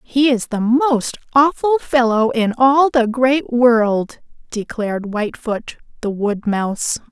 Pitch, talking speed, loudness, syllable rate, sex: 240 Hz, 135 wpm, -17 LUFS, 3.7 syllables/s, female